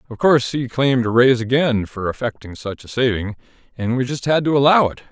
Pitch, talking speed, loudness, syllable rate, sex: 125 Hz, 225 wpm, -18 LUFS, 6.0 syllables/s, male